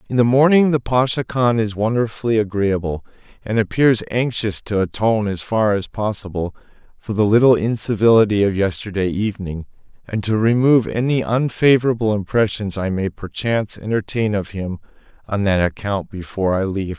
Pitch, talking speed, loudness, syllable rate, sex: 105 Hz, 150 wpm, -18 LUFS, 5.4 syllables/s, male